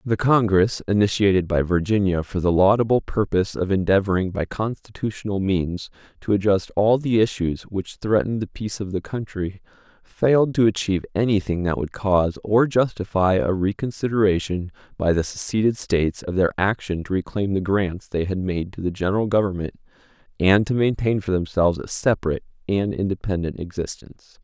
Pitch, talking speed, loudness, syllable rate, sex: 100 Hz, 160 wpm, -22 LUFS, 5.5 syllables/s, male